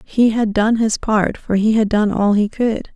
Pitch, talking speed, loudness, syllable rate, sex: 215 Hz, 245 wpm, -17 LUFS, 4.4 syllables/s, female